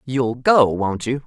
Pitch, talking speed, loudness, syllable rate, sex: 125 Hz, 190 wpm, -18 LUFS, 3.5 syllables/s, female